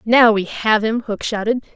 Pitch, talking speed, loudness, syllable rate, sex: 220 Hz, 205 wpm, -17 LUFS, 4.6 syllables/s, female